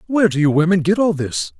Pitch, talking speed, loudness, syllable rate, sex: 165 Hz, 265 wpm, -17 LUFS, 6.4 syllables/s, male